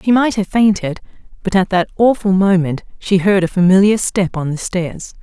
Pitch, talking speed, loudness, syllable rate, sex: 190 Hz, 195 wpm, -15 LUFS, 4.9 syllables/s, female